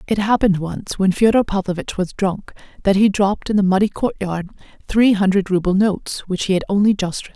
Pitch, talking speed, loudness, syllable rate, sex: 195 Hz, 205 wpm, -18 LUFS, 6.0 syllables/s, female